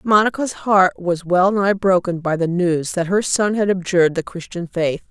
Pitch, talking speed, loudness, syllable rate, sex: 185 Hz, 200 wpm, -18 LUFS, 4.6 syllables/s, female